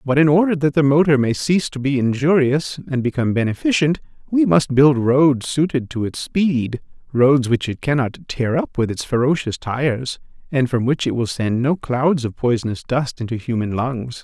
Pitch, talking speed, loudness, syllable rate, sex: 130 Hz, 195 wpm, -19 LUFS, 5.0 syllables/s, male